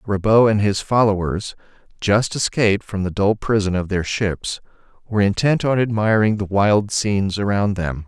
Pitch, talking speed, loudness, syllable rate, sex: 105 Hz, 170 wpm, -19 LUFS, 5.0 syllables/s, male